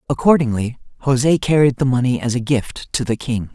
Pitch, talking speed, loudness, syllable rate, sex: 130 Hz, 185 wpm, -18 LUFS, 5.2 syllables/s, male